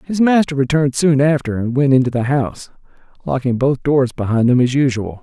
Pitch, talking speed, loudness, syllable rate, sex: 135 Hz, 195 wpm, -16 LUFS, 5.7 syllables/s, male